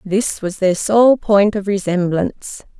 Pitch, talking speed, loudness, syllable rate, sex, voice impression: 200 Hz, 150 wpm, -16 LUFS, 3.9 syllables/s, female, very feminine, middle-aged, slightly thin, slightly tensed, slightly weak, bright, soft, clear, fluent, slightly raspy, slightly cute, intellectual, refreshing, sincere, very calm, very friendly, very reassuring, unique, very elegant, sweet, lively, very kind, slightly modest, slightly light